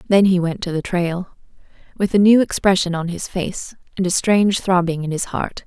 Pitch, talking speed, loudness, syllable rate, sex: 185 Hz, 210 wpm, -18 LUFS, 5.1 syllables/s, female